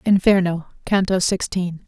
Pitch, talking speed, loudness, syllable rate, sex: 185 Hz, 95 wpm, -20 LUFS, 4.5 syllables/s, female